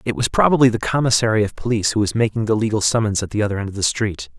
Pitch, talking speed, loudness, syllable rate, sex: 110 Hz, 275 wpm, -18 LUFS, 7.3 syllables/s, male